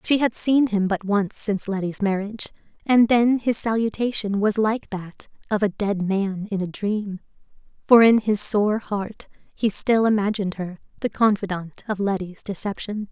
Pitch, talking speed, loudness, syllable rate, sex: 205 Hz, 170 wpm, -22 LUFS, 4.7 syllables/s, female